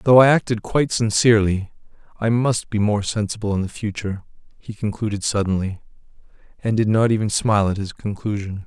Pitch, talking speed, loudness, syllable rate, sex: 105 Hz, 165 wpm, -20 LUFS, 5.9 syllables/s, male